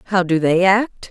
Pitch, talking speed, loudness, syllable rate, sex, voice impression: 185 Hz, 215 wpm, -16 LUFS, 4.5 syllables/s, female, feminine, middle-aged, tensed, powerful, bright, clear, slightly fluent, intellectual, slightly calm, friendly, reassuring, elegant, lively, slightly kind